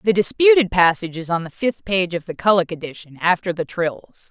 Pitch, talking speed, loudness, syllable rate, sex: 180 Hz, 210 wpm, -19 LUFS, 5.5 syllables/s, female